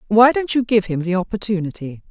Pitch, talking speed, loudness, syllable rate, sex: 200 Hz, 200 wpm, -18 LUFS, 5.9 syllables/s, female